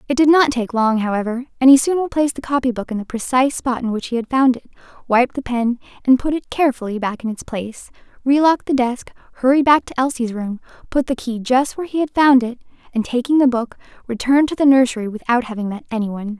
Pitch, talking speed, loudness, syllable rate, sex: 250 Hz, 235 wpm, -18 LUFS, 6.5 syllables/s, female